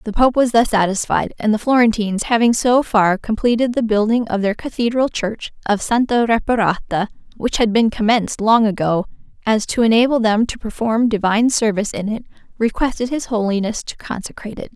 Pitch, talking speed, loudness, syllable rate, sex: 220 Hz, 175 wpm, -17 LUFS, 5.6 syllables/s, female